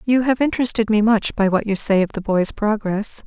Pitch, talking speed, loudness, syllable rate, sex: 215 Hz, 240 wpm, -18 LUFS, 5.4 syllables/s, female